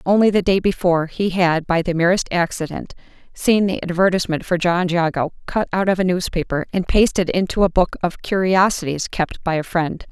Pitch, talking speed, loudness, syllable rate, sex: 180 Hz, 190 wpm, -19 LUFS, 5.4 syllables/s, female